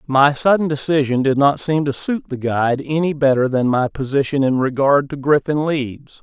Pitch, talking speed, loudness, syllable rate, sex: 140 Hz, 195 wpm, -17 LUFS, 5.0 syllables/s, male